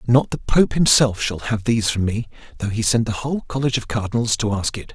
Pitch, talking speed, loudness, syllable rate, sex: 115 Hz, 240 wpm, -20 LUFS, 6.1 syllables/s, male